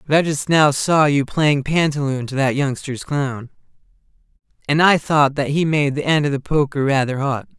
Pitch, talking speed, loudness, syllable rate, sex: 145 Hz, 200 wpm, -18 LUFS, 4.8 syllables/s, male